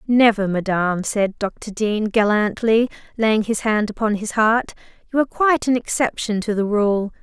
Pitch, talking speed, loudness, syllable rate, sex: 215 Hz, 165 wpm, -19 LUFS, 4.5 syllables/s, female